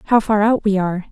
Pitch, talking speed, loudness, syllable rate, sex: 205 Hz, 270 wpm, -17 LUFS, 7.0 syllables/s, female